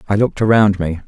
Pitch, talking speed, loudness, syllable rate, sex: 100 Hz, 220 wpm, -15 LUFS, 7.0 syllables/s, male